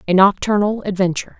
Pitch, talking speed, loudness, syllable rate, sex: 195 Hz, 130 wpm, -17 LUFS, 6.7 syllables/s, female